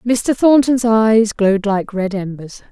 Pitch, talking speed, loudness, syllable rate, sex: 215 Hz, 155 wpm, -15 LUFS, 4.0 syllables/s, female